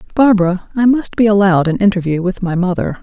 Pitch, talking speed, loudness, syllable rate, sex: 195 Hz, 200 wpm, -14 LUFS, 6.4 syllables/s, female